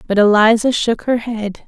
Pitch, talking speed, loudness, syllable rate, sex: 220 Hz, 180 wpm, -15 LUFS, 4.6 syllables/s, female